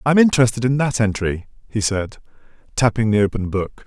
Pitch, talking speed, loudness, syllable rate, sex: 115 Hz, 170 wpm, -19 LUFS, 5.7 syllables/s, male